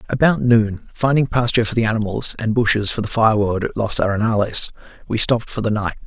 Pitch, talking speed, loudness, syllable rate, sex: 110 Hz, 190 wpm, -18 LUFS, 6.0 syllables/s, male